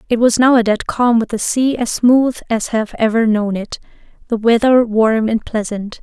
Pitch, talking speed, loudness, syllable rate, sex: 230 Hz, 200 wpm, -15 LUFS, 4.6 syllables/s, female